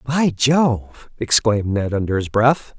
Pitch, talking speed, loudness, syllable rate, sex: 120 Hz, 150 wpm, -18 LUFS, 3.9 syllables/s, male